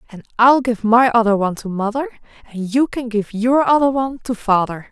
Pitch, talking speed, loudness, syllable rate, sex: 230 Hz, 205 wpm, -17 LUFS, 5.6 syllables/s, female